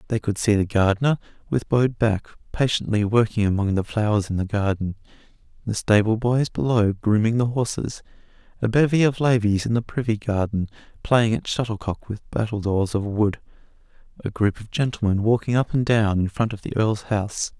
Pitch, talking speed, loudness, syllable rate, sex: 110 Hz, 175 wpm, -22 LUFS, 5.4 syllables/s, male